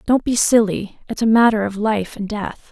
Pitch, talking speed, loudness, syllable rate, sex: 215 Hz, 220 wpm, -18 LUFS, 4.8 syllables/s, female